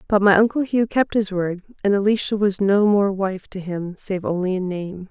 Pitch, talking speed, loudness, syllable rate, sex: 195 Hz, 225 wpm, -20 LUFS, 4.9 syllables/s, female